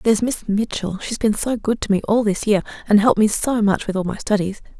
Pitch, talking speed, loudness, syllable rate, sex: 210 Hz, 250 wpm, -19 LUFS, 5.6 syllables/s, female